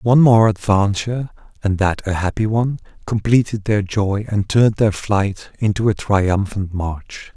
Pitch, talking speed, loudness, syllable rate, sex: 105 Hz, 155 wpm, -18 LUFS, 4.5 syllables/s, male